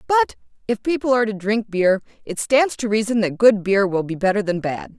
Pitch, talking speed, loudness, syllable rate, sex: 215 Hz, 230 wpm, -20 LUFS, 5.4 syllables/s, female